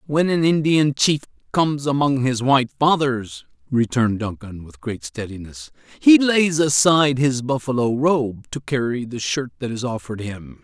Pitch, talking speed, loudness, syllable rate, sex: 130 Hz, 160 wpm, -19 LUFS, 4.7 syllables/s, male